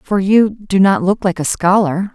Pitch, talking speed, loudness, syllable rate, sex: 195 Hz, 225 wpm, -14 LUFS, 4.3 syllables/s, female